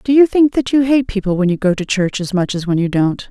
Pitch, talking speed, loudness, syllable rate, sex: 215 Hz, 325 wpm, -15 LUFS, 5.9 syllables/s, female